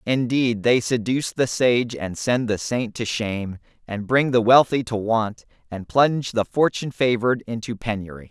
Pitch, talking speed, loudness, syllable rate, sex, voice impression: 120 Hz, 175 wpm, -21 LUFS, 4.8 syllables/s, male, masculine, adult-like, tensed, slightly powerful, bright, clear, slightly nasal, cool, sincere, calm, friendly, reassuring, lively, slightly kind, light